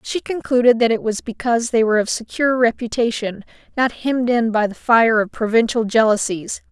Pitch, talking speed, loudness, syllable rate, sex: 230 Hz, 180 wpm, -18 LUFS, 5.6 syllables/s, female